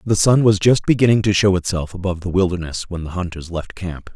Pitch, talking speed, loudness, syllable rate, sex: 95 Hz, 230 wpm, -18 LUFS, 6.0 syllables/s, male